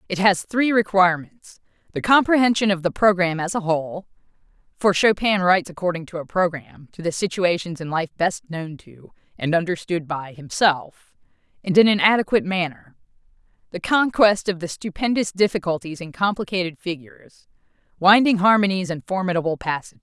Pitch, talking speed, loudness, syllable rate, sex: 180 Hz, 145 wpm, -20 LUFS, 5.6 syllables/s, female